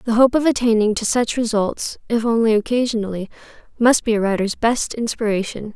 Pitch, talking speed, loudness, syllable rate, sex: 225 Hz, 165 wpm, -19 LUFS, 5.6 syllables/s, female